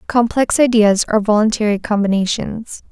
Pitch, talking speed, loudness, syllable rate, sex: 215 Hz, 105 wpm, -15 LUFS, 5.2 syllables/s, female